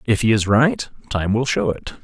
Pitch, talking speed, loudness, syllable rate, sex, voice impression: 115 Hz, 235 wpm, -19 LUFS, 4.8 syllables/s, male, masculine, adult-like, thick, tensed, powerful, clear, slightly halting, slightly cool, calm, slightly mature, wild, lively, slightly intense